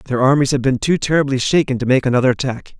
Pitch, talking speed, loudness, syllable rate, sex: 135 Hz, 235 wpm, -16 LUFS, 6.6 syllables/s, male